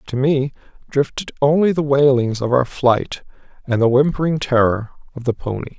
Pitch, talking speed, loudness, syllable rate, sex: 135 Hz, 165 wpm, -18 LUFS, 5.1 syllables/s, male